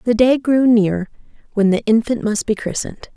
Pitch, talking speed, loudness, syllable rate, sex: 220 Hz, 190 wpm, -17 LUFS, 5.1 syllables/s, female